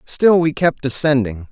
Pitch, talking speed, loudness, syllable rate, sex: 145 Hz, 160 wpm, -16 LUFS, 4.3 syllables/s, male